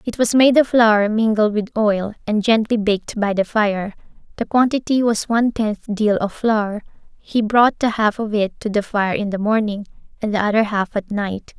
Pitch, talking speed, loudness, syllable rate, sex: 215 Hz, 205 wpm, -18 LUFS, 4.7 syllables/s, female